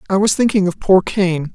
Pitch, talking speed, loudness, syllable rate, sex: 190 Hz, 235 wpm, -15 LUFS, 5.2 syllables/s, female